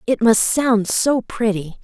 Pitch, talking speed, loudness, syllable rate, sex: 220 Hz, 165 wpm, -17 LUFS, 3.7 syllables/s, female